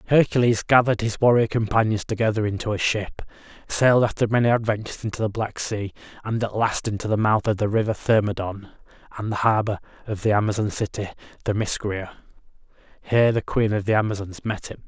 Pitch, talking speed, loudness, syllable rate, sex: 110 Hz, 175 wpm, -22 LUFS, 6.2 syllables/s, male